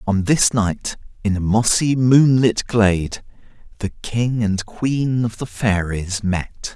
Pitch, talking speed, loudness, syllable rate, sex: 110 Hz, 140 wpm, -19 LUFS, 3.5 syllables/s, male